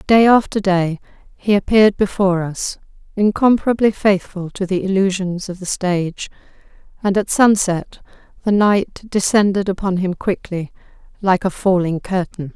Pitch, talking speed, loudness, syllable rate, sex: 190 Hz, 135 wpm, -17 LUFS, 4.7 syllables/s, female